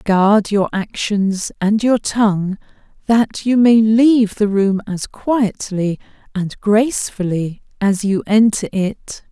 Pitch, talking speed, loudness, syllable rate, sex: 210 Hz, 130 wpm, -16 LUFS, 3.5 syllables/s, female